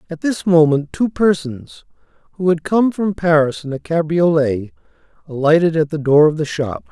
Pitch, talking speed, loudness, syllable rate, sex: 160 Hz, 175 wpm, -16 LUFS, 4.9 syllables/s, male